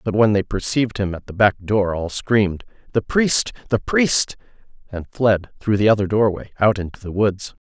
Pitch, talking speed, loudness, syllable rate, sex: 105 Hz, 190 wpm, -19 LUFS, 5.0 syllables/s, male